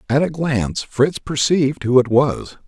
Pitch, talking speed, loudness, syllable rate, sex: 140 Hz, 180 wpm, -18 LUFS, 4.6 syllables/s, male